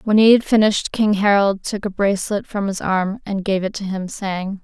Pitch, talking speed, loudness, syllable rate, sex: 200 Hz, 235 wpm, -18 LUFS, 5.1 syllables/s, female